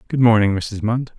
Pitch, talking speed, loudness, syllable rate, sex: 110 Hz, 205 wpm, -18 LUFS, 5.2 syllables/s, male